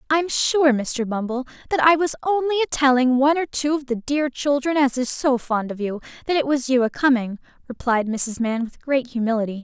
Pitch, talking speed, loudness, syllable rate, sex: 265 Hz, 220 wpm, -21 LUFS, 5.3 syllables/s, female